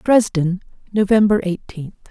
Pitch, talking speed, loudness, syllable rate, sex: 195 Hz, 85 wpm, -18 LUFS, 4.4 syllables/s, female